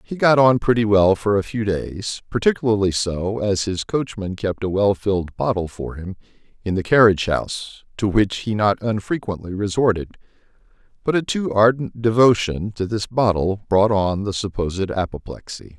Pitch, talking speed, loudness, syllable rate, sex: 105 Hz, 165 wpm, -20 LUFS, 4.9 syllables/s, male